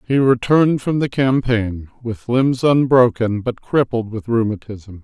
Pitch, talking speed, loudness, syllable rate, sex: 120 Hz, 145 wpm, -17 LUFS, 4.2 syllables/s, male